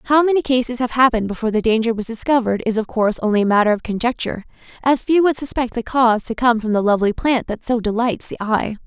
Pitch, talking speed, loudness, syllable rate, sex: 235 Hz, 235 wpm, -18 LUFS, 6.8 syllables/s, female